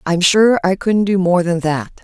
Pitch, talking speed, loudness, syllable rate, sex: 185 Hz, 235 wpm, -15 LUFS, 4.5 syllables/s, female